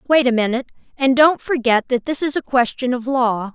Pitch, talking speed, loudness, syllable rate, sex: 255 Hz, 220 wpm, -18 LUFS, 5.6 syllables/s, female